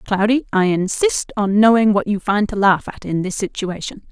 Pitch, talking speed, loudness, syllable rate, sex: 205 Hz, 205 wpm, -17 LUFS, 5.0 syllables/s, female